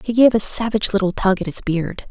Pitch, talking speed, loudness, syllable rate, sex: 200 Hz, 255 wpm, -18 LUFS, 6.2 syllables/s, female